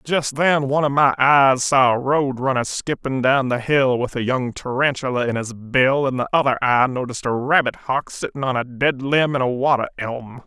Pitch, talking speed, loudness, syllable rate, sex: 130 Hz, 210 wpm, -19 LUFS, 4.9 syllables/s, male